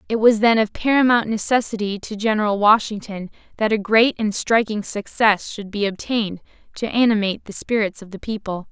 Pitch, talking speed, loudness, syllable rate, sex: 215 Hz, 170 wpm, -19 LUFS, 5.5 syllables/s, female